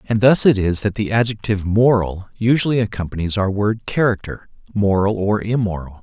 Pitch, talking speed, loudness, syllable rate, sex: 105 Hz, 150 wpm, -18 LUFS, 5.3 syllables/s, male